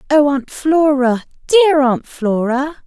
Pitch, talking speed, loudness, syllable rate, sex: 280 Hz, 125 wpm, -15 LUFS, 3.4 syllables/s, female